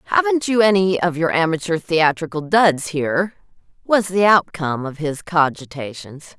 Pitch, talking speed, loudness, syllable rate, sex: 170 Hz, 140 wpm, -18 LUFS, 4.8 syllables/s, female